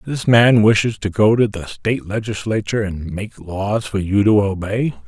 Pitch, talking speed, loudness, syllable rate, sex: 105 Hz, 190 wpm, -18 LUFS, 4.8 syllables/s, male